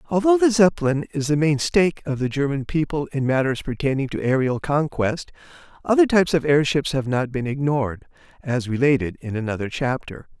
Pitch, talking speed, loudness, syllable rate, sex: 145 Hz, 175 wpm, -21 LUFS, 5.6 syllables/s, male